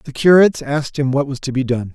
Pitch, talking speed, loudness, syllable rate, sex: 140 Hz, 275 wpm, -16 LUFS, 6.3 syllables/s, male